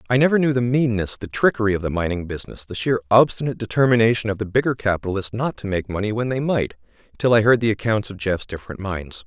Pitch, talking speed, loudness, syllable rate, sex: 110 Hz, 225 wpm, -21 LUFS, 6.8 syllables/s, male